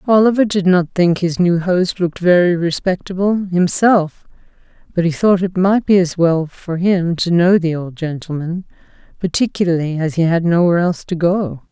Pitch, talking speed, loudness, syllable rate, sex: 175 Hz, 175 wpm, -16 LUFS, 4.9 syllables/s, female